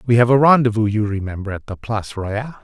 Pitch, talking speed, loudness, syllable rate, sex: 110 Hz, 230 wpm, -18 LUFS, 6.4 syllables/s, male